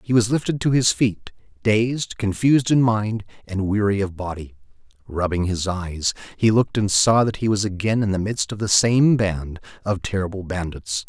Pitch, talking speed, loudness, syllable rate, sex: 105 Hz, 190 wpm, -21 LUFS, 4.9 syllables/s, male